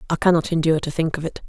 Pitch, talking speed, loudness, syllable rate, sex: 160 Hz, 285 wpm, -21 LUFS, 7.8 syllables/s, female